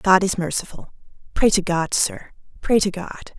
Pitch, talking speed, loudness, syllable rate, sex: 190 Hz, 175 wpm, -20 LUFS, 4.8 syllables/s, female